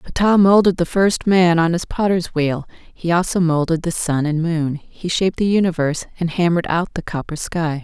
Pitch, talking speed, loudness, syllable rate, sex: 170 Hz, 200 wpm, -18 LUFS, 5.1 syllables/s, female